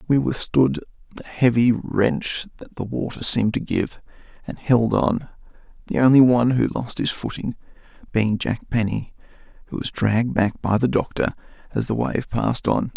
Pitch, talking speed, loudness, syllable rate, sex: 120 Hz, 165 wpm, -21 LUFS, 4.8 syllables/s, male